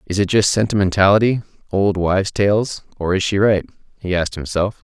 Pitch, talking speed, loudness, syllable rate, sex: 100 Hz, 170 wpm, -18 LUFS, 5.6 syllables/s, male